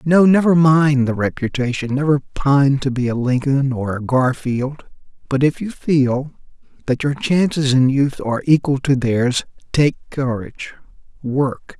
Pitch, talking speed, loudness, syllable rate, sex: 135 Hz, 150 wpm, -17 LUFS, 4.3 syllables/s, male